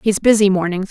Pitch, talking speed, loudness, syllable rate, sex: 195 Hz, 200 wpm, -15 LUFS, 5.4 syllables/s, female